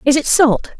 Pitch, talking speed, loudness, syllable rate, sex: 280 Hz, 225 wpm, -13 LUFS, 4.8 syllables/s, female